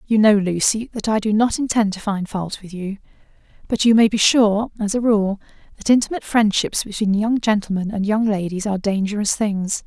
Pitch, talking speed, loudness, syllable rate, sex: 210 Hz, 200 wpm, -19 LUFS, 5.4 syllables/s, female